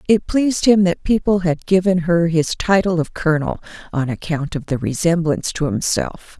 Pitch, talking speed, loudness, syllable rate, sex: 170 Hz, 180 wpm, -18 LUFS, 5.1 syllables/s, female